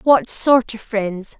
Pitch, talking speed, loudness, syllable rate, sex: 225 Hz, 170 wpm, -18 LUFS, 3.1 syllables/s, female